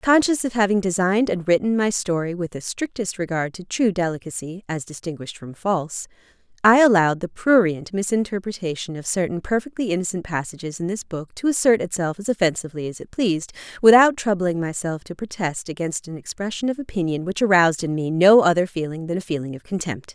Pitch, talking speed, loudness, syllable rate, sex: 185 Hz, 180 wpm, -21 LUFS, 5.9 syllables/s, female